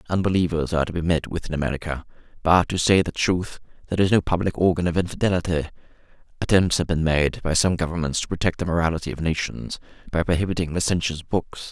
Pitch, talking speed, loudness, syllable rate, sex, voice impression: 85 Hz, 190 wpm, -23 LUFS, 6.6 syllables/s, male, masculine, adult-like, slightly thin, slightly weak, slightly hard, fluent, slightly cool, calm, slightly strict, sharp